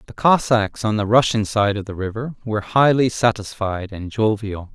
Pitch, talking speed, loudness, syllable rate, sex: 110 Hz, 175 wpm, -19 LUFS, 4.9 syllables/s, male